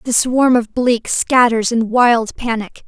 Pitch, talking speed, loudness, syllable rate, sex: 235 Hz, 165 wpm, -15 LUFS, 3.6 syllables/s, female